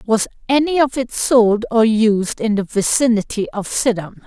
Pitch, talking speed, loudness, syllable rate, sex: 225 Hz, 170 wpm, -17 LUFS, 4.3 syllables/s, female